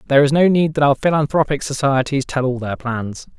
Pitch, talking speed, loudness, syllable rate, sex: 140 Hz, 215 wpm, -17 LUFS, 5.8 syllables/s, male